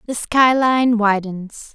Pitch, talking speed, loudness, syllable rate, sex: 230 Hz, 135 wpm, -16 LUFS, 3.1 syllables/s, female